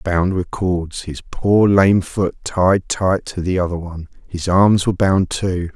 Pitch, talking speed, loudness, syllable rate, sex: 90 Hz, 210 wpm, -17 LUFS, 5.2 syllables/s, male